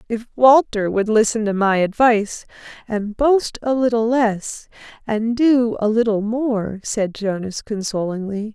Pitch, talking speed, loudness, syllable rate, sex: 220 Hz, 140 wpm, -19 LUFS, 4.1 syllables/s, female